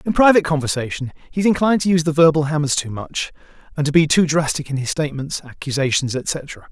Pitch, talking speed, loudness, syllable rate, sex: 150 Hz, 205 wpm, -19 LUFS, 6.6 syllables/s, male